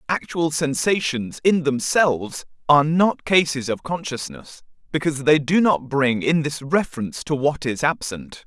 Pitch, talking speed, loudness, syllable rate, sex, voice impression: 150 Hz, 150 wpm, -21 LUFS, 4.7 syllables/s, male, very masculine, very tensed, very powerful, bright, hard, very clear, very fluent, cool, slightly intellectual, refreshing, sincere, slightly calm, slightly mature, unique, very wild, slightly sweet, very lively, very strict, very intense, sharp